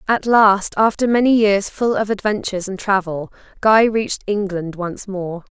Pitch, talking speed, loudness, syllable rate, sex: 205 Hz, 160 wpm, -17 LUFS, 4.6 syllables/s, female